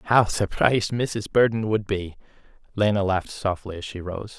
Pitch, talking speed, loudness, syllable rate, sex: 100 Hz, 165 wpm, -24 LUFS, 4.8 syllables/s, male